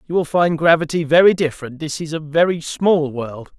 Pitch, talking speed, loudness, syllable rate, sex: 155 Hz, 185 wpm, -17 LUFS, 5.3 syllables/s, male